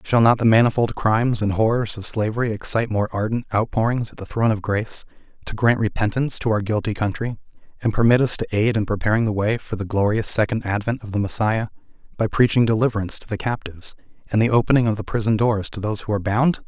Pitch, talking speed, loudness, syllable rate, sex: 110 Hz, 215 wpm, -21 LUFS, 6.6 syllables/s, male